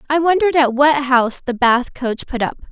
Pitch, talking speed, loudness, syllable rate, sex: 270 Hz, 220 wpm, -16 LUFS, 5.3 syllables/s, female